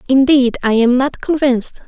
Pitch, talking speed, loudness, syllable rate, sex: 260 Hz, 160 wpm, -14 LUFS, 5.0 syllables/s, female